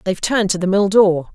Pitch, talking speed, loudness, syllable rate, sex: 195 Hz, 265 wpm, -16 LUFS, 6.7 syllables/s, female